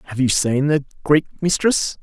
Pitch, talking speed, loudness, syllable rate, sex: 145 Hz, 180 wpm, -18 LUFS, 4.4 syllables/s, male